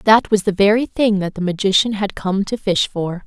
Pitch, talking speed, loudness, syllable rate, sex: 200 Hz, 240 wpm, -17 LUFS, 5.0 syllables/s, female